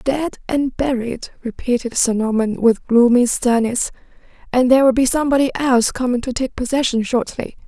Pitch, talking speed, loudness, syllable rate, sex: 250 Hz, 155 wpm, -17 LUFS, 5.3 syllables/s, female